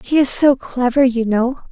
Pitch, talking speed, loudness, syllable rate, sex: 255 Hz, 210 wpm, -15 LUFS, 4.6 syllables/s, female